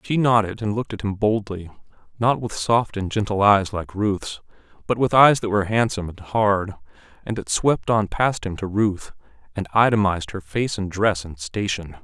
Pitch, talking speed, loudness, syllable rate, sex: 100 Hz, 195 wpm, -21 LUFS, 5.0 syllables/s, male